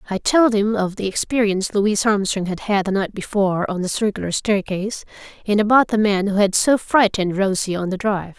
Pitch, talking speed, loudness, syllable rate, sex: 205 Hz, 210 wpm, -19 LUFS, 5.8 syllables/s, female